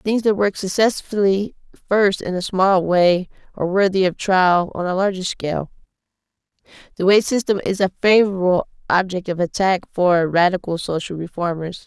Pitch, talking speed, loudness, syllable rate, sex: 185 Hz, 150 wpm, -19 LUFS, 5.1 syllables/s, female